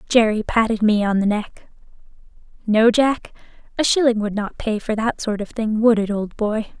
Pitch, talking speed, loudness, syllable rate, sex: 220 Hz, 195 wpm, -19 LUFS, 4.8 syllables/s, female